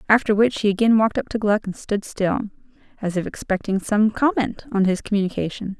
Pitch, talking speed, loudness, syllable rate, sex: 210 Hz, 195 wpm, -21 LUFS, 5.9 syllables/s, female